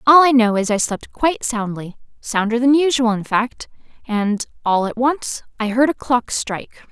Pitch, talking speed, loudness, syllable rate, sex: 235 Hz, 180 wpm, -18 LUFS, 4.7 syllables/s, female